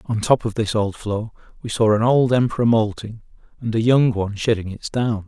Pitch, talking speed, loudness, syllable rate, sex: 110 Hz, 215 wpm, -20 LUFS, 5.4 syllables/s, male